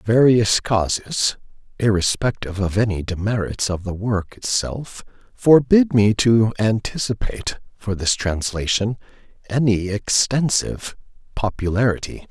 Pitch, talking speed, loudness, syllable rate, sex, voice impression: 105 Hz, 100 wpm, -20 LUFS, 4.3 syllables/s, male, very masculine, very adult-like, old, very thick, tensed, very powerful, very bright, soft, muffled, fluent, raspy, very cool, intellectual, very sincere, very calm, very mature, friendly, very reassuring, very unique, slightly elegant, very wild, sweet, very lively, kind